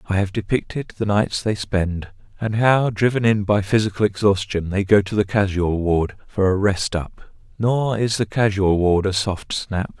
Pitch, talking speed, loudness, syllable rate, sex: 100 Hz, 190 wpm, -20 LUFS, 4.5 syllables/s, male